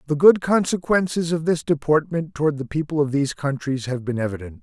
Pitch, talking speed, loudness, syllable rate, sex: 150 Hz, 195 wpm, -21 LUFS, 5.8 syllables/s, male